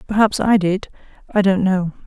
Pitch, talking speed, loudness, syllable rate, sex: 195 Hz, 145 wpm, -18 LUFS, 5.0 syllables/s, female